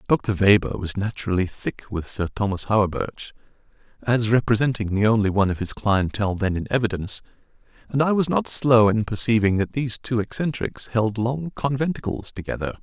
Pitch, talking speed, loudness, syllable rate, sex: 110 Hz, 165 wpm, -22 LUFS, 5.7 syllables/s, male